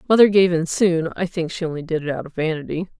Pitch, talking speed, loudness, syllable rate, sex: 170 Hz, 240 wpm, -20 LUFS, 6.3 syllables/s, female